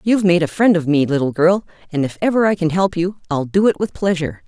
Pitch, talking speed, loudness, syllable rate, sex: 175 Hz, 270 wpm, -17 LUFS, 6.3 syllables/s, female